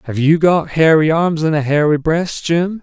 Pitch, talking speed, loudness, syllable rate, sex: 160 Hz, 215 wpm, -14 LUFS, 4.5 syllables/s, male